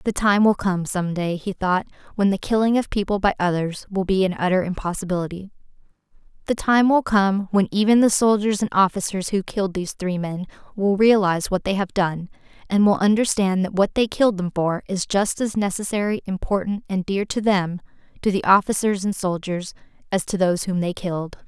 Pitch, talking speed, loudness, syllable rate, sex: 195 Hz, 190 wpm, -21 LUFS, 5.5 syllables/s, female